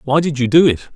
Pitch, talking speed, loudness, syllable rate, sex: 140 Hz, 315 wpm, -14 LUFS, 7.0 syllables/s, male